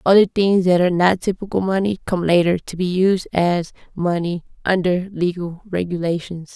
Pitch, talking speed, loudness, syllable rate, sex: 180 Hz, 155 wpm, -19 LUFS, 5.0 syllables/s, female